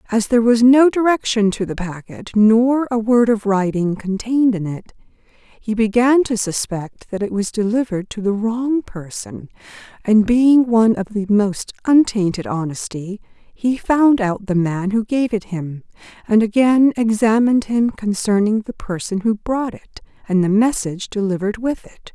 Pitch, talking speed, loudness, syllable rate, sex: 220 Hz, 165 wpm, -17 LUFS, 4.6 syllables/s, female